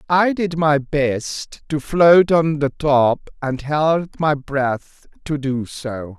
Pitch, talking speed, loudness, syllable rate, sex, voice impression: 145 Hz, 155 wpm, -18 LUFS, 2.9 syllables/s, male, very masculine, adult-like, middle-aged, slightly thick, tensed, slightly powerful, bright, slightly soft, clear, fluent, cool, intellectual, slightly refreshing, very sincere, calm, slightly mature, friendly, slightly reassuring, slightly unique, elegant, slightly wild, lively, kind, modest, slightly light